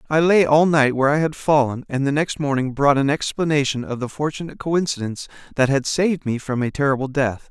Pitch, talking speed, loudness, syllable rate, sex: 140 Hz, 215 wpm, -20 LUFS, 6.0 syllables/s, male